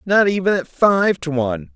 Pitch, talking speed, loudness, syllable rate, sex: 165 Hz, 205 wpm, -18 LUFS, 5.0 syllables/s, male